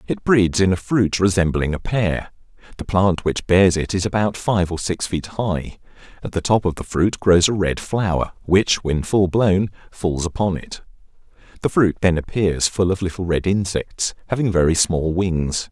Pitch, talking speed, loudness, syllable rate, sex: 95 Hz, 190 wpm, -19 LUFS, 4.5 syllables/s, male